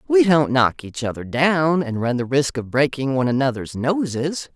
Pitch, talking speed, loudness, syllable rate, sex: 140 Hz, 195 wpm, -20 LUFS, 4.8 syllables/s, female